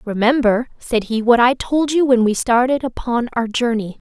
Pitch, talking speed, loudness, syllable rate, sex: 240 Hz, 190 wpm, -17 LUFS, 4.7 syllables/s, female